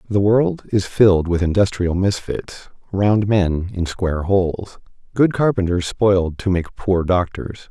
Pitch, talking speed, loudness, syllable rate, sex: 95 Hz, 150 wpm, -18 LUFS, 4.3 syllables/s, male